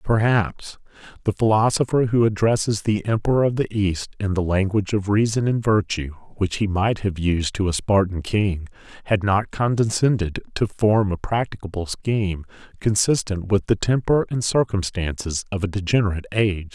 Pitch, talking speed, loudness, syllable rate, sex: 100 Hz, 160 wpm, -21 LUFS, 5.1 syllables/s, male